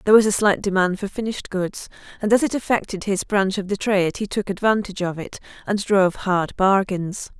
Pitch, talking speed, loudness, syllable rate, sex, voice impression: 195 Hz, 210 wpm, -21 LUFS, 5.7 syllables/s, female, feminine, adult-like, fluent, slightly intellectual, slightly calm, slightly reassuring